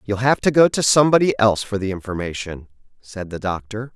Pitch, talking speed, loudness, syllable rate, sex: 110 Hz, 195 wpm, -18 LUFS, 6.0 syllables/s, male